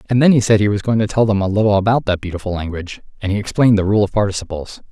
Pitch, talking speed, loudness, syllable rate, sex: 105 Hz, 280 wpm, -16 LUFS, 7.7 syllables/s, male